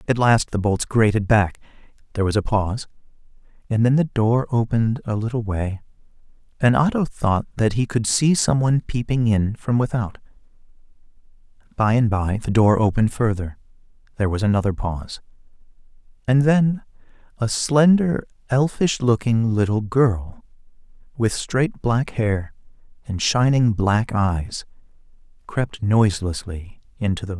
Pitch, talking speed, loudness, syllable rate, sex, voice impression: 115 Hz, 135 wpm, -20 LUFS, 4.8 syllables/s, male, masculine, adult-like, slightly cool, slightly intellectual, slightly calm, slightly friendly